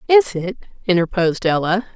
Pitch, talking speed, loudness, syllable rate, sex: 200 Hz, 125 wpm, -18 LUFS, 5.6 syllables/s, female